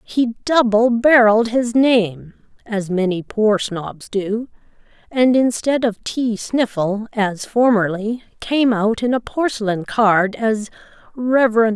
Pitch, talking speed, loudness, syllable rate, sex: 225 Hz, 130 wpm, -18 LUFS, 3.2 syllables/s, female